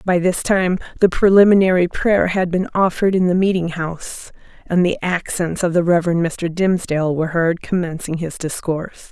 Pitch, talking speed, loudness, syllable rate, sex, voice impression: 175 Hz, 170 wpm, -17 LUFS, 5.4 syllables/s, female, feminine, adult-like, slightly relaxed, bright, soft, slightly raspy, intellectual, calm, friendly, reassuring, elegant, slightly lively, slightly kind, slightly modest